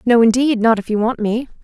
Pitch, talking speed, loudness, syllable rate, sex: 230 Hz, 220 wpm, -16 LUFS, 5.6 syllables/s, female